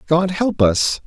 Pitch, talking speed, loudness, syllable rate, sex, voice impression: 165 Hz, 170 wpm, -17 LUFS, 3.3 syllables/s, male, masculine, adult-like, slightly refreshing, sincere, calm